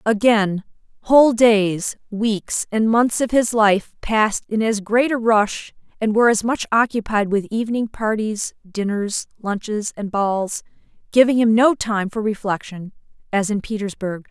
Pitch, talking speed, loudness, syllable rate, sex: 215 Hz, 150 wpm, -19 LUFS, 4.3 syllables/s, female